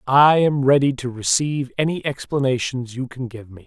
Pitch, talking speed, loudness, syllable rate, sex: 130 Hz, 180 wpm, -20 LUFS, 5.2 syllables/s, male